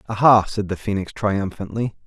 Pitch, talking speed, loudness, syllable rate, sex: 105 Hz, 145 wpm, -20 LUFS, 5.0 syllables/s, male